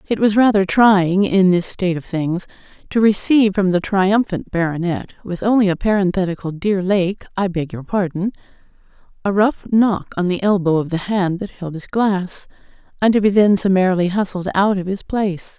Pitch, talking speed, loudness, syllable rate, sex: 190 Hz, 185 wpm, -17 LUFS, 5.1 syllables/s, female